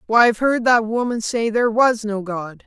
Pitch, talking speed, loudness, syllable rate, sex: 225 Hz, 225 wpm, -18 LUFS, 5.2 syllables/s, female